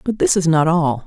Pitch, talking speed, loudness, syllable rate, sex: 175 Hz, 280 wpm, -16 LUFS, 5.2 syllables/s, female